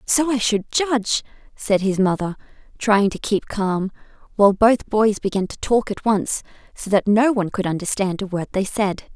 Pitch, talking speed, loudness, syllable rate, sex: 210 Hz, 190 wpm, -20 LUFS, 4.8 syllables/s, female